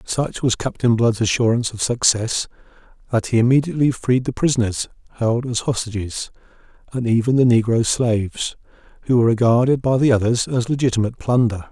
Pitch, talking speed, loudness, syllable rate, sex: 120 Hz, 155 wpm, -19 LUFS, 5.8 syllables/s, male